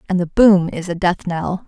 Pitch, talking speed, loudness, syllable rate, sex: 180 Hz, 250 wpm, -17 LUFS, 4.8 syllables/s, female